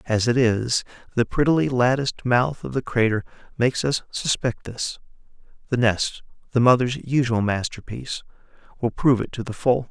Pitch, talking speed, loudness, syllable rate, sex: 125 Hz, 155 wpm, -22 LUFS, 5.2 syllables/s, male